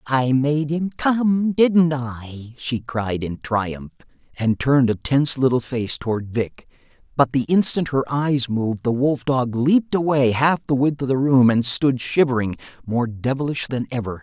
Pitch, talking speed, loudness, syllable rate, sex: 135 Hz, 175 wpm, -20 LUFS, 4.4 syllables/s, male